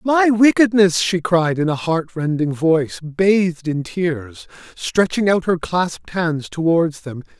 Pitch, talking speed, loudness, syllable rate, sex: 170 Hz, 145 wpm, -18 LUFS, 3.9 syllables/s, male